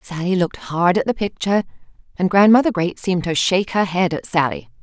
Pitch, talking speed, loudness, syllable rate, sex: 185 Hz, 200 wpm, -18 LUFS, 6.1 syllables/s, female